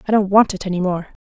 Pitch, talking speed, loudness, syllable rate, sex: 195 Hz, 295 wpm, -17 LUFS, 6.9 syllables/s, female